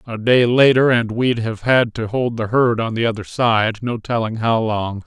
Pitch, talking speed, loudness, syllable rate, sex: 115 Hz, 225 wpm, -17 LUFS, 4.4 syllables/s, male